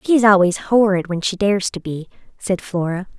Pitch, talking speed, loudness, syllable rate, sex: 195 Hz, 190 wpm, -18 LUFS, 5.2 syllables/s, female